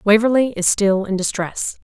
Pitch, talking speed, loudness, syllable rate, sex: 210 Hz, 160 wpm, -18 LUFS, 4.8 syllables/s, female